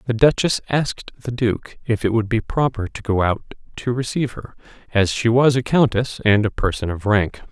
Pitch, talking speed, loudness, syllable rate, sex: 115 Hz, 205 wpm, -20 LUFS, 5.2 syllables/s, male